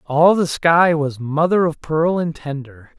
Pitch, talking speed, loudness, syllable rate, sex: 155 Hz, 180 wpm, -17 LUFS, 3.9 syllables/s, male